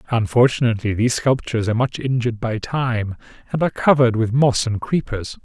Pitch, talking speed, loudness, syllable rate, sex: 120 Hz, 165 wpm, -19 LUFS, 6.2 syllables/s, male